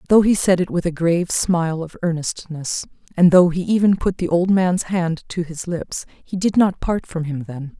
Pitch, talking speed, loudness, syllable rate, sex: 175 Hz, 225 wpm, -19 LUFS, 4.8 syllables/s, female